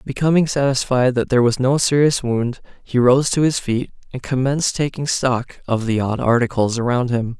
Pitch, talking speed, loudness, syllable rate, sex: 130 Hz, 185 wpm, -18 LUFS, 5.2 syllables/s, male